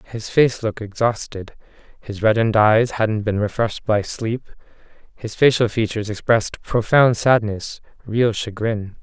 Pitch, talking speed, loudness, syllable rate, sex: 110 Hz, 135 wpm, -19 LUFS, 4.6 syllables/s, male